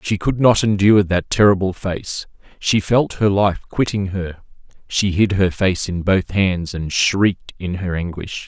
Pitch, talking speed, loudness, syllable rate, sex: 95 Hz, 175 wpm, -18 LUFS, 4.3 syllables/s, male